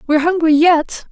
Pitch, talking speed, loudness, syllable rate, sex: 320 Hz, 160 wpm, -13 LUFS, 5.5 syllables/s, female